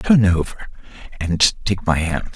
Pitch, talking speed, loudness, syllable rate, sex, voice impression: 95 Hz, 155 wpm, -19 LUFS, 4.2 syllables/s, male, very masculine, very adult-like, slightly old, very thick, slightly relaxed, very powerful, very bright, very soft, muffled, fluent, very cool, very intellectual, refreshing, very sincere, very calm, very mature, very friendly, very reassuring, very unique, very elegant, very wild, very sweet, lively, kind